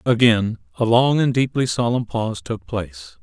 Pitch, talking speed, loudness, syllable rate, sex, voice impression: 110 Hz, 165 wpm, -20 LUFS, 4.8 syllables/s, male, masculine, adult-like, slightly cool, slightly intellectual, sincere, calm, slightly elegant